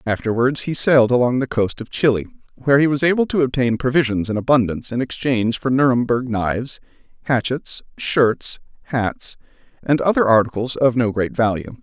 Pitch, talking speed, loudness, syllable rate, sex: 125 Hz, 160 wpm, -18 LUFS, 5.5 syllables/s, male